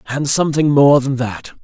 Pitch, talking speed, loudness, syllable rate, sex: 135 Hz, 185 wpm, -14 LUFS, 4.9 syllables/s, male